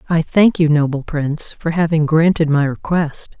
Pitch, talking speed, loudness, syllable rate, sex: 155 Hz, 175 wpm, -16 LUFS, 4.8 syllables/s, female